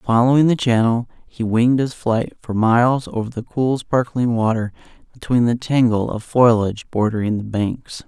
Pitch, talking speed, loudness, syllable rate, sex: 115 Hz, 165 wpm, -18 LUFS, 4.9 syllables/s, male